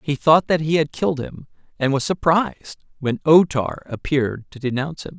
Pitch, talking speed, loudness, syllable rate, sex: 150 Hz, 195 wpm, -20 LUFS, 5.4 syllables/s, male